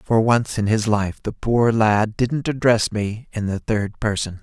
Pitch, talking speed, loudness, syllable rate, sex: 110 Hz, 205 wpm, -20 LUFS, 4.0 syllables/s, male